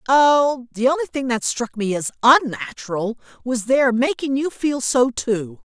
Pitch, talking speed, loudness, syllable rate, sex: 250 Hz, 170 wpm, -19 LUFS, 4.3 syllables/s, female